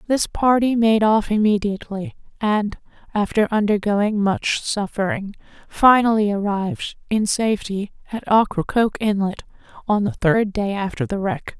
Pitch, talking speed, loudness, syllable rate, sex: 205 Hz, 125 wpm, -20 LUFS, 4.6 syllables/s, female